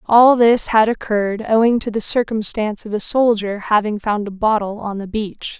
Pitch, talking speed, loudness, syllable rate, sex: 215 Hz, 195 wpm, -17 LUFS, 5.0 syllables/s, female